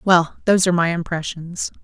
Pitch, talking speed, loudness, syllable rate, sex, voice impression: 175 Hz, 165 wpm, -19 LUFS, 5.7 syllables/s, female, very feminine, slightly young, very thin, very tensed, very powerful, very bright, slightly soft, very clear, very fluent, very cute, slightly intellectual, very refreshing, slightly sincere, slightly calm, very friendly, slightly reassuring, very unique, elegant, very wild, sweet, lively, strict, intense, very sharp, very light